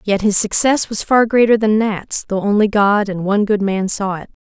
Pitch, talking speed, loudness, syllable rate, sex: 205 Hz, 230 wpm, -15 LUFS, 5.0 syllables/s, female